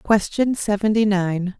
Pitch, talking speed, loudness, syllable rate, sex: 205 Hz, 115 wpm, -20 LUFS, 3.9 syllables/s, female